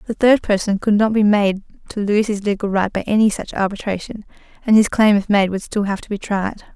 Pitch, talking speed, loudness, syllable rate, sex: 205 Hz, 240 wpm, -18 LUFS, 5.6 syllables/s, female